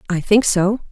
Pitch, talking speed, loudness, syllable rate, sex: 200 Hz, 195 wpm, -16 LUFS, 4.5 syllables/s, female